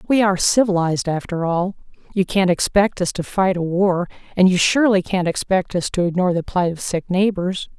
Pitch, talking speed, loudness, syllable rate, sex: 185 Hz, 195 wpm, -19 LUFS, 5.6 syllables/s, female